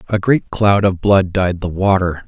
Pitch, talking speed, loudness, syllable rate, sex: 95 Hz, 210 wpm, -15 LUFS, 4.3 syllables/s, male